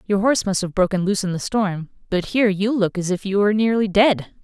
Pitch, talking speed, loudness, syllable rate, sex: 200 Hz, 255 wpm, -20 LUFS, 6.2 syllables/s, female